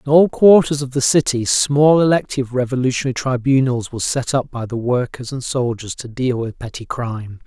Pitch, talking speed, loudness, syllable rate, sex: 130 Hz, 185 wpm, -17 LUFS, 5.5 syllables/s, male